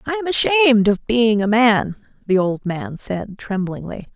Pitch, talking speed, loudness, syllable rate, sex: 220 Hz, 175 wpm, -18 LUFS, 4.4 syllables/s, female